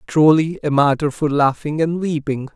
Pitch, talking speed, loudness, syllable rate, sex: 150 Hz, 165 wpm, -18 LUFS, 4.7 syllables/s, male